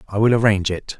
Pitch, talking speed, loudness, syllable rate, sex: 105 Hz, 240 wpm, -18 LUFS, 7.2 syllables/s, male